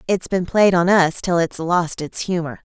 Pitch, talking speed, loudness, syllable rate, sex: 175 Hz, 220 wpm, -18 LUFS, 4.4 syllables/s, female